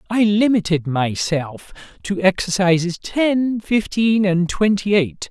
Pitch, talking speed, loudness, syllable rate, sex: 195 Hz, 115 wpm, -18 LUFS, 3.8 syllables/s, male